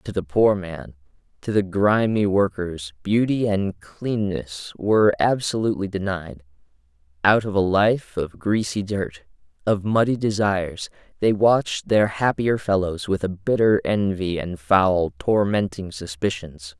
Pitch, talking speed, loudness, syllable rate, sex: 100 Hz, 130 wpm, -22 LUFS, 4.1 syllables/s, male